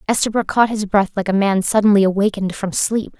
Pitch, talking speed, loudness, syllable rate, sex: 205 Hz, 205 wpm, -17 LUFS, 6.1 syllables/s, female